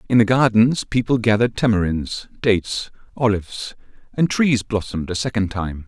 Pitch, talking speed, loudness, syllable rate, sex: 110 Hz, 145 wpm, -20 LUFS, 5.3 syllables/s, male